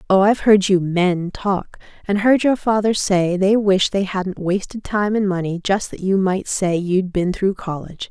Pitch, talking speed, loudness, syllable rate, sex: 195 Hz, 205 wpm, -18 LUFS, 4.5 syllables/s, female